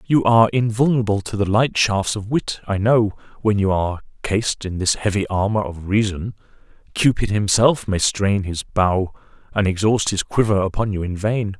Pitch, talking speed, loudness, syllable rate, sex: 105 Hz, 180 wpm, -19 LUFS, 5.0 syllables/s, male